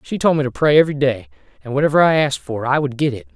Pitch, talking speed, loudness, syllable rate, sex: 135 Hz, 285 wpm, -17 LUFS, 7.3 syllables/s, male